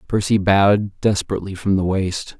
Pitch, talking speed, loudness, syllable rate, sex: 95 Hz, 150 wpm, -19 LUFS, 5.4 syllables/s, male